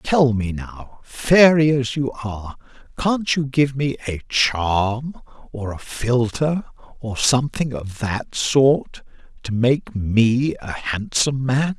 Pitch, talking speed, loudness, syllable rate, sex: 125 Hz, 130 wpm, -20 LUFS, 3.4 syllables/s, male